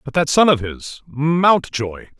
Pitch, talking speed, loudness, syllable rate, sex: 145 Hz, 135 wpm, -17 LUFS, 3.5 syllables/s, male